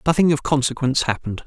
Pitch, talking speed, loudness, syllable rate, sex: 140 Hz, 165 wpm, -20 LUFS, 7.5 syllables/s, male